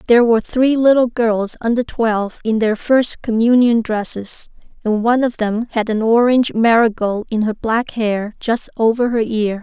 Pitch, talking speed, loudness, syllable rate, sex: 225 Hz, 175 wpm, -16 LUFS, 4.8 syllables/s, female